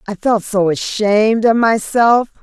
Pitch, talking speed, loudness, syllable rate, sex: 215 Hz, 150 wpm, -14 LUFS, 4.2 syllables/s, female